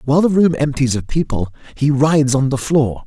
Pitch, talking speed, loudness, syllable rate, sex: 140 Hz, 215 wpm, -16 LUFS, 5.6 syllables/s, male